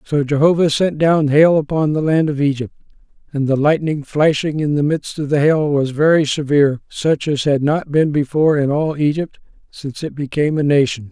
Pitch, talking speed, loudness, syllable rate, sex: 150 Hz, 200 wpm, -16 LUFS, 5.3 syllables/s, male